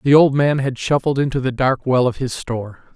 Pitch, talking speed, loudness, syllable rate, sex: 130 Hz, 245 wpm, -18 LUFS, 5.5 syllables/s, male